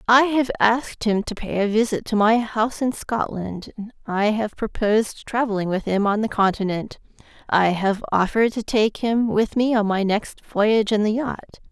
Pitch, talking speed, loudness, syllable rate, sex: 215 Hz, 190 wpm, -21 LUFS, 4.8 syllables/s, female